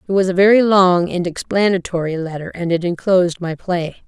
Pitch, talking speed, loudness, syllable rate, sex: 180 Hz, 190 wpm, -17 LUFS, 5.5 syllables/s, female